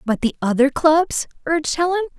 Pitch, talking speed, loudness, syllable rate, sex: 305 Hz, 165 wpm, -19 LUFS, 5.3 syllables/s, female